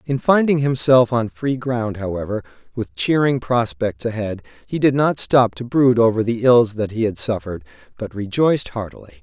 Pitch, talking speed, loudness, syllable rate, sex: 115 Hz, 175 wpm, -19 LUFS, 5.0 syllables/s, male